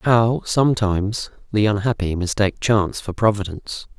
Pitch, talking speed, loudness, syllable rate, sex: 105 Hz, 120 wpm, -20 LUFS, 5.2 syllables/s, male